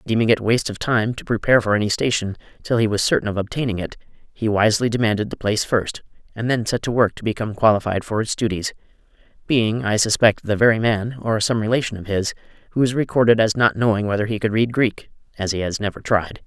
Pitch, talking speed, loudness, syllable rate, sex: 110 Hz, 220 wpm, -20 LUFS, 6.4 syllables/s, male